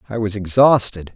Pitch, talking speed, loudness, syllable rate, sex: 105 Hz, 155 wpm, -16 LUFS, 5.3 syllables/s, male